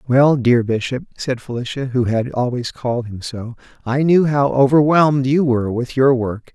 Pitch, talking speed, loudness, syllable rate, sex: 130 Hz, 185 wpm, -17 LUFS, 4.9 syllables/s, male